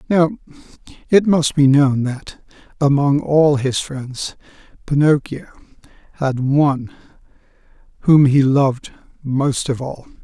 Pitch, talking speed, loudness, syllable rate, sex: 140 Hz, 110 wpm, -17 LUFS, 3.9 syllables/s, male